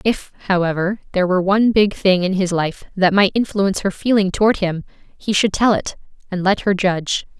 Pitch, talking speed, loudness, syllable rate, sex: 190 Hz, 205 wpm, -18 LUFS, 5.7 syllables/s, female